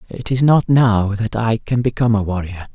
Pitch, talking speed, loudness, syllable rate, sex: 110 Hz, 220 wpm, -17 LUFS, 5.2 syllables/s, male